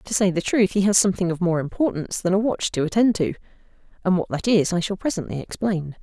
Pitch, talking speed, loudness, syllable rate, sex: 190 Hz, 230 wpm, -22 LUFS, 6.4 syllables/s, female